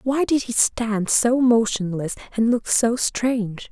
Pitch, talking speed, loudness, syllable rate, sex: 230 Hz, 160 wpm, -20 LUFS, 3.8 syllables/s, female